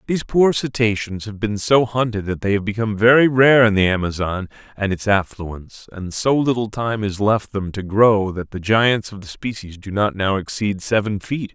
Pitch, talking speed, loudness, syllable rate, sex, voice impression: 105 Hz, 210 wpm, -19 LUFS, 4.9 syllables/s, male, masculine, adult-like, tensed, powerful, slightly hard, clear, intellectual, calm, wild, lively, slightly kind